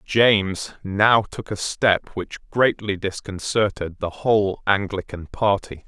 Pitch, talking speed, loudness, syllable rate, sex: 100 Hz, 120 wpm, -21 LUFS, 3.7 syllables/s, male